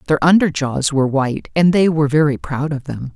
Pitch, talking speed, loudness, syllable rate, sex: 150 Hz, 230 wpm, -16 LUFS, 5.9 syllables/s, female